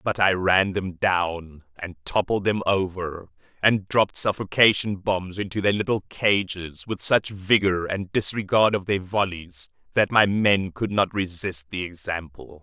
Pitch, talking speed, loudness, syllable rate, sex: 95 Hz, 155 wpm, -23 LUFS, 4.2 syllables/s, male